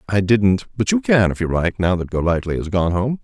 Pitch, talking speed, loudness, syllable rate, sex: 100 Hz, 260 wpm, -18 LUFS, 5.4 syllables/s, male